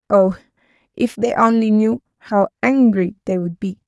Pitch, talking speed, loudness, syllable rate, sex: 210 Hz, 155 wpm, -17 LUFS, 4.7 syllables/s, female